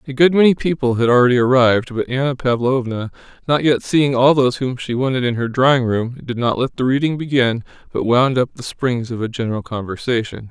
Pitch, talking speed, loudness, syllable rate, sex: 125 Hz, 210 wpm, -17 LUFS, 5.8 syllables/s, male